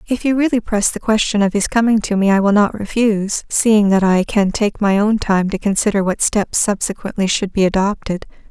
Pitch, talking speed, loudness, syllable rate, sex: 205 Hz, 220 wpm, -16 LUFS, 5.3 syllables/s, female